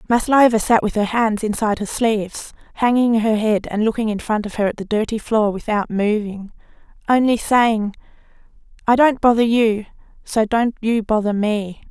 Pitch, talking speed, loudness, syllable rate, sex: 220 Hz, 170 wpm, -18 LUFS, 5.0 syllables/s, female